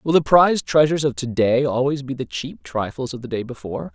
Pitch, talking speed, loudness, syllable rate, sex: 130 Hz, 245 wpm, -20 LUFS, 5.9 syllables/s, male